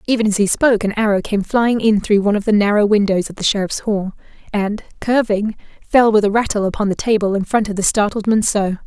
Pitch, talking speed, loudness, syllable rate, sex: 210 Hz, 230 wpm, -16 LUFS, 6.1 syllables/s, female